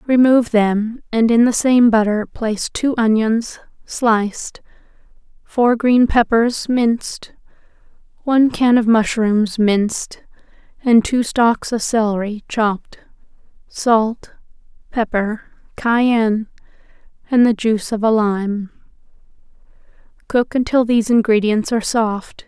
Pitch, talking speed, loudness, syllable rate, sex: 225 Hz, 110 wpm, -16 LUFS, 3.9 syllables/s, female